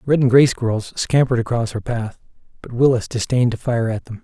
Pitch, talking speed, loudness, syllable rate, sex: 120 Hz, 215 wpm, -18 LUFS, 6.0 syllables/s, male